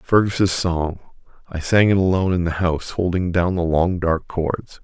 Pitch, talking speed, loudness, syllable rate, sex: 90 Hz, 185 wpm, -20 LUFS, 4.7 syllables/s, male